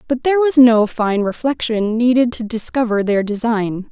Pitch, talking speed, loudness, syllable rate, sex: 235 Hz, 170 wpm, -16 LUFS, 4.8 syllables/s, female